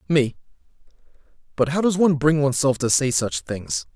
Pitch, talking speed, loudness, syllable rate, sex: 135 Hz, 165 wpm, -21 LUFS, 5.6 syllables/s, male